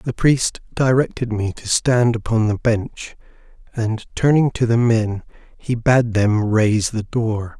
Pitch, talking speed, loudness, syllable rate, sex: 115 Hz, 160 wpm, -18 LUFS, 3.9 syllables/s, male